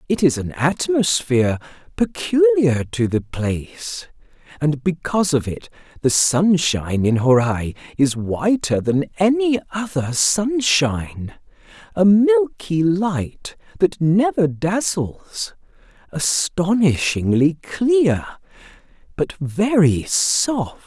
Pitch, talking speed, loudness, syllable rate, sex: 165 Hz, 90 wpm, -19 LUFS, 3.4 syllables/s, male